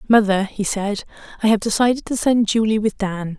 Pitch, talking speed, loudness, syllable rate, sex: 210 Hz, 195 wpm, -19 LUFS, 5.3 syllables/s, female